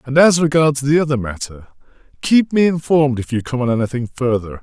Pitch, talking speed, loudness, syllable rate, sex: 135 Hz, 180 wpm, -16 LUFS, 5.8 syllables/s, male